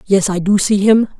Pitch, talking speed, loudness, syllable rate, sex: 200 Hz, 250 wpm, -14 LUFS, 5.2 syllables/s, female